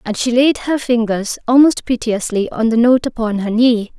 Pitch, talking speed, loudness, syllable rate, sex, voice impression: 235 Hz, 195 wpm, -15 LUFS, 4.8 syllables/s, female, gender-neutral, slightly young, tensed, powerful, bright, soft, clear, slightly halting, friendly, lively, kind, modest